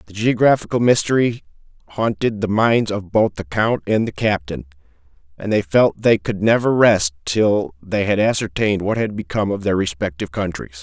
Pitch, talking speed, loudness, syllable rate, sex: 100 Hz, 170 wpm, -18 LUFS, 5.2 syllables/s, male